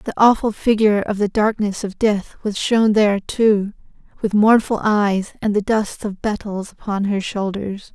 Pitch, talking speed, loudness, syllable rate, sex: 205 Hz, 175 wpm, -18 LUFS, 4.5 syllables/s, female